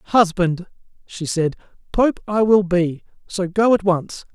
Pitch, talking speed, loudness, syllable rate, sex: 185 Hz, 150 wpm, -19 LUFS, 3.8 syllables/s, male